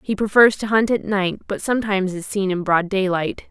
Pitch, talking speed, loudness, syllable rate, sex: 200 Hz, 220 wpm, -19 LUFS, 5.5 syllables/s, female